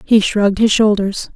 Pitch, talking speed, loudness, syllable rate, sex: 205 Hz, 175 wpm, -14 LUFS, 4.8 syllables/s, female